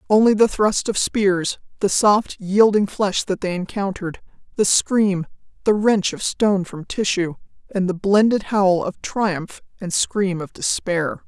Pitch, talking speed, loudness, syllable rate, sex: 195 Hz, 160 wpm, -20 LUFS, 4.1 syllables/s, female